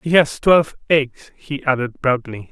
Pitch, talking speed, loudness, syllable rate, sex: 140 Hz, 165 wpm, -18 LUFS, 4.4 syllables/s, male